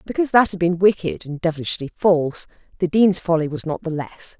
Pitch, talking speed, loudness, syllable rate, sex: 175 Hz, 205 wpm, -20 LUFS, 5.9 syllables/s, female